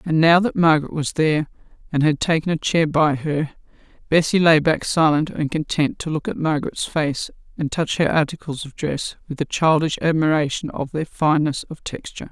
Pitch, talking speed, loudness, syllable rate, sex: 155 Hz, 190 wpm, -20 LUFS, 5.4 syllables/s, female